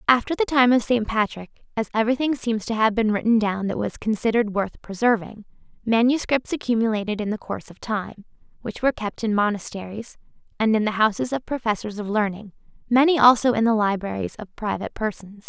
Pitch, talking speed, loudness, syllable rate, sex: 220 Hz, 180 wpm, -22 LUFS, 6.0 syllables/s, female